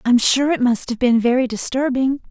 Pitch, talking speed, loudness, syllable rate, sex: 250 Hz, 210 wpm, -18 LUFS, 5.2 syllables/s, female